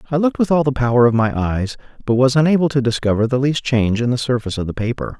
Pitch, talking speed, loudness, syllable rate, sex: 125 Hz, 265 wpm, -17 LUFS, 7.1 syllables/s, male